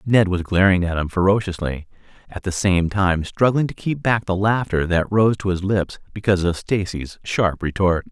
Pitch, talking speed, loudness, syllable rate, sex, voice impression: 95 Hz, 190 wpm, -20 LUFS, 4.9 syllables/s, male, masculine, adult-like, tensed, slightly powerful, clear, fluent, cool, intellectual, sincere, calm, friendly, reassuring, wild, lively, kind